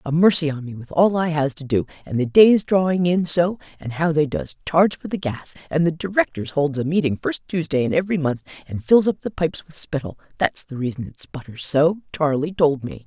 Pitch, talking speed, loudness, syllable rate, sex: 155 Hz, 235 wpm, -20 LUFS, 5.6 syllables/s, female